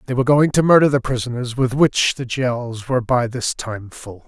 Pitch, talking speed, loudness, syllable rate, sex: 125 Hz, 225 wpm, -18 LUFS, 5.1 syllables/s, male